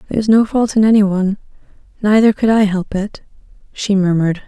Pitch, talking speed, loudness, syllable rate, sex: 205 Hz, 190 wpm, -14 LUFS, 6.4 syllables/s, female